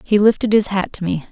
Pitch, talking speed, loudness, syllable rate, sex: 200 Hz, 275 wpm, -17 LUFS, 5.8 syllables/s, female